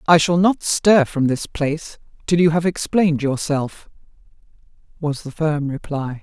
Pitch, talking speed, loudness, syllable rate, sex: 155 Hz, 155 wpm, -19 LUFS, 4.5 syllables/s, female